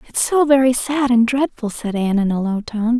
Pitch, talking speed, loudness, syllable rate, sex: 240 Hz, 240 wpm, -17 LUFS, 5.3 syllables/s, female